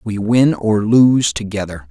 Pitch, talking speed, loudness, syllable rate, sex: 110 Hz, 155 wpm, -15 LUFS, 3.9 syllables/s, male